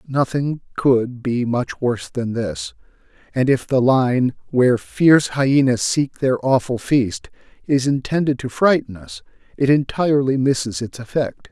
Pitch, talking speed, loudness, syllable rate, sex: 125 Hz, 145 wpm, -19 LUFS, 4.3 syllables/s, male